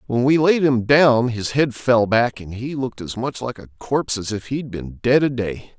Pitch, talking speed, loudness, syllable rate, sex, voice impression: 120 Hz, 260 wpm, -20 LUFS, 4.9 syllables/s, male, very masculine, very adult-like, middle-aged, very thick, very tensed, very powerful, bright, hard, slightly muffled, very fluent, slightly raspy, very cool, slightly intellectual, slightly refreshing, sincere, slightly calm, very mature, wild, very lively, slightly strict, slightly intense